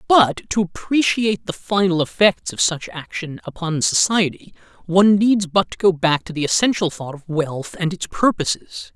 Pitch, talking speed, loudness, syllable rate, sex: 180 Hz, 175 wpm, -19 LUFS, 4.8 syllables/s, male